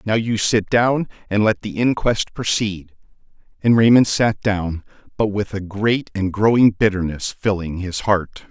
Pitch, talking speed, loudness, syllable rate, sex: 105 Hz, 160 wpm, -19 LUFS, 4.2 syllables/s, male